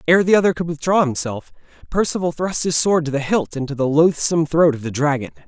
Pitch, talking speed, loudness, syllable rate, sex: 155 Hz, 220 wpm, -18 LUFS, 6.0 syllables/s, male